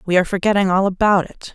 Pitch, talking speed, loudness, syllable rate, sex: 190 Hz, 235 wpm, -17 LUFS, 7.0 syllables/s, female